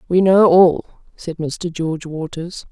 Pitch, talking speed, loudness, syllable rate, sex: 170 Hz, 155 wpm, -16 LUFS, 4.1 syllables/s, female